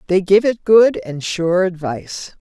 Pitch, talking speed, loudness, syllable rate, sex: 190 Hz, 175 wpm, -16 LUFS, 4.1 syllables/s, female